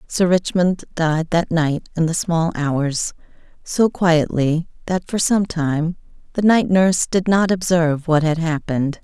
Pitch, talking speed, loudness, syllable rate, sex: 170 Hz, 160 wpm, -19 LUFS, 4.1 syllables/s, female